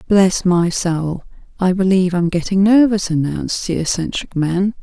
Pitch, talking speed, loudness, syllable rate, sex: 185 Hz, 150 wpm, -16 LUFS, 4.7 syllables/s, female